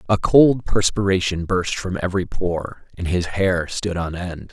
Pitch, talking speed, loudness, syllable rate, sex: 90 Hz, 175 wpm, -20 LUFS, 4.3 syllables/s, male